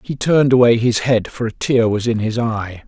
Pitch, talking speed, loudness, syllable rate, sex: 115 Hz, 250 wpm, -16 LUFS, 5.1 syllables/s, male